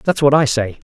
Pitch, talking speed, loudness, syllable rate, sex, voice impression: 135 Hz, 265 wpm, -15 LUFS, 5.1 syllables/s, male, masculine, adult-like, slightly weak, soft, fluent, slightly raspy, intellectual, sincere, calm, slightly friendly, reassuring, slightly wild, kind, modest